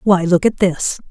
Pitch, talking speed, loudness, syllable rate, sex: 185 Hz, 215 wpm, -16 LUFS, 4.3 syllables/s, female